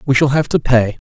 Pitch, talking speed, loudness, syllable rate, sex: 130 Hz, 280 wpm, -15 LUFS, 5.6 syllables/s, male